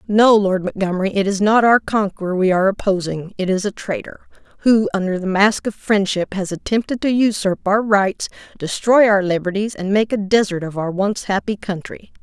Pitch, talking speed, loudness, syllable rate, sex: 200 Hz, 190 wpm, -18 LUFS, 5.2 syllables/s, female